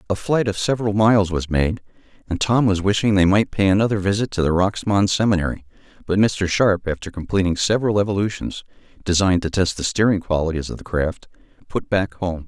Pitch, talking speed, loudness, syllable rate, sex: 95 Hz, 190 wpm, -20 LUFS, 5.9 syllables/s, male